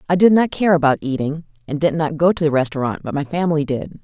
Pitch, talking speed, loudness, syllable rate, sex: 155 Hz, 255 wpm, -18 LUFS, 6.4 syllables/s, female